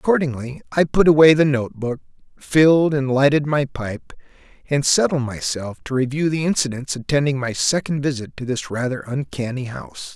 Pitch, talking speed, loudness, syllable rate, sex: 135 Hz, 160 wpm, -19 LUFS, 5.3 syllables/s, male